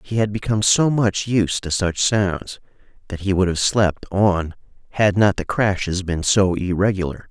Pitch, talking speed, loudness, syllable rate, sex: 95 Hz, 180 wpm, -19 LUFS, 4.5 syllables/s, male